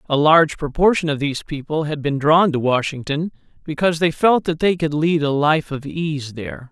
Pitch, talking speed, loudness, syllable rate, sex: 155 Hz, 205 wpm, -18 LUFS, 5.4 syllables/s, male